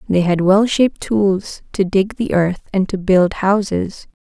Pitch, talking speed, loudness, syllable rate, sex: 195 Hz, 185 wpm, -16 LUFS, 4.0 syllables/s, female